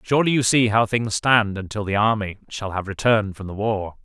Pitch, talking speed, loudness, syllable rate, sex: 105 Hz, 225 wpm, -21 LUFS, 5.5 syllables/s, male